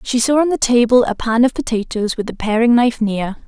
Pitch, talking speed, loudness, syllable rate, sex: 235 Hz, 240 wpm, -16 LUFS, 5.8 syllables/s, female